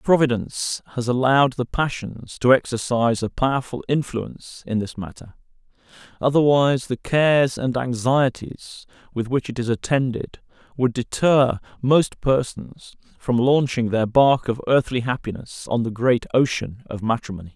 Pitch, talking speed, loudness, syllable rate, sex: 125 Hz, 135 wpm, -21 LUFS, 4.8 syllables/s, male